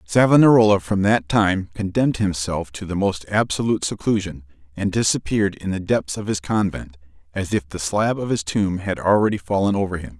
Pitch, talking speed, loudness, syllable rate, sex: 95 Hz, 180 wpm, -20 LUFS, 5.4 syllables/s, male